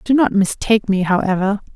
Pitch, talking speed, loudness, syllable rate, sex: 205 Hz, 170 wpm, -17 LUFS, 5.8 syllables/s, female